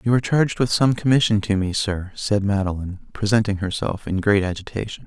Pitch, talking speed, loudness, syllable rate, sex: 105 Hz, 190 wpm, -21 LUFS, 6.0 syllables/s, male